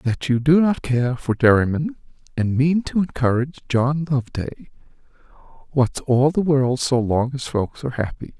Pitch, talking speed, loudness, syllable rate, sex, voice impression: 135 Hz, 165 wpm, -20 LUFS, 4.9 syllables/s, male, masculine, adult-like, soft, slightly cool, sincere, calm, slightly kind